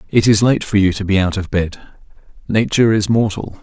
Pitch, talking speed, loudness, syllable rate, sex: 105 Hz, 215 wpm, -16 LUFS, 5.5 syllables/s, male